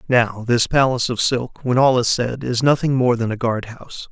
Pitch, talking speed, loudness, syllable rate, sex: 120 Hz, 235 wpm, -18 LUFS, 5.1 syllables/s, male